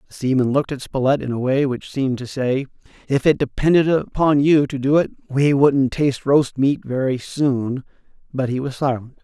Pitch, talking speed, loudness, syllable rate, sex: 135 Hz, 200 wpm, -19 LUFS, 5.2 syllables/s, male